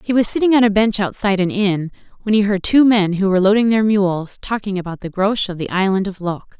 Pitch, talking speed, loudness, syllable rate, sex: 200 Hz, 255 wpm, -17 LUFS, 6.1 syllables/s, female